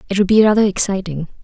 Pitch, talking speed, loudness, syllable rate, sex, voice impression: 195 Hz, 210 wpm, -15 LUFS, 7.1 syllables/s, female, very feminine, slightly gender-neutral, young, thin, slightly tensed, slightly weak, slightly dark, very soft, very clear, fluent, slightly raspy, very cute, intellectual, refreshing, sincere, calm, very friendly, very reassuring, very unique, elegant, slightly wild, sweet, lively, kind, slightly sharp, modest, light